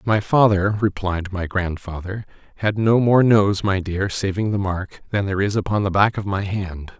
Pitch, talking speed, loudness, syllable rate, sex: 100 Hz, 195 wpm, -20 LUFS, 4.7 syllables/s, male